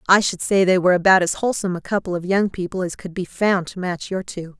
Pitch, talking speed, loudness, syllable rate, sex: 185 Hz, 275 wpm, -20 LUFS, 6.3 syllables/s, female